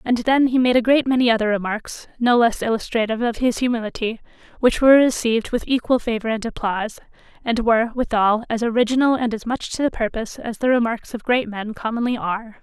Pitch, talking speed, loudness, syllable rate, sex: 235 Hz, 200 wpm, -20 LUFS, 6.1 syllables/s, female